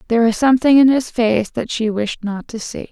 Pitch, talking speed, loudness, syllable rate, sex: 230 Hz, 270 wpm, -16 LUFS, 5.8 syllables/s, female